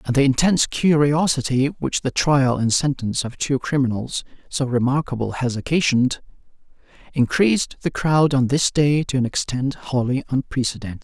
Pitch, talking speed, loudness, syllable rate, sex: 135 Hz, 145 wpm, -20 LUFS, 5.1 syllables/s, male